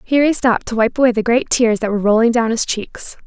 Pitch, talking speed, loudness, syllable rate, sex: 235 Hz, 275 wpm, -16 LUFS, 6.5 syllables/s, female